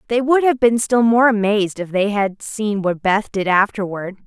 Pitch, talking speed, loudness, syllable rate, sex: 210 Hz, 210 wpm, -17 LUFS, 4.8 syllables/s, female